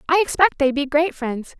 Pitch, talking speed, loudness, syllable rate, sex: 300 Hz, 225 wpm, -19 LUFS, 4.9 syllables/s, female